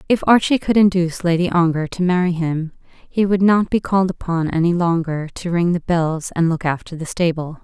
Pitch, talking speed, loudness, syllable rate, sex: 175 Hz, 205 wpm, -18 LUFS, 5.3 syllables/s, female